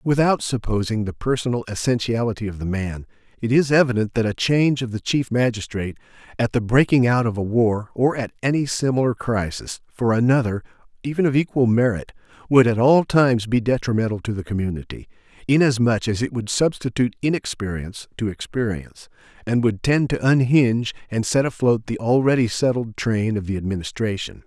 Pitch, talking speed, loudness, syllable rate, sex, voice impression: 120 Hz, 165 wpm, -21 LUFS, 5.7 syllables/s, male, very masculine, very adult-like, very middle-aged, thick, slightly tensed, slightly powerful, slightly bright, soft, slightly clear, fluent, slightly raspy, cool, very intellectual, very sincere, calm, very mature, very friendly, very reassuring, unique, slightly elegant, wild, sweet, slightly lively, very kind